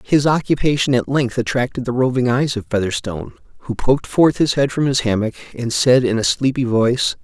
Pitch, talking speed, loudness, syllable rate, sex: 125 Hz, 200 wpm, -18 LUFS, 5.6 syllables/s, male